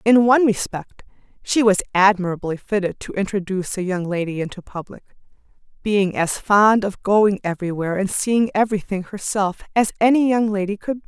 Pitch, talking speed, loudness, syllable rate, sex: 200 Hz, 165 wpm, -19 LUFS, 5.6 syllables/s, female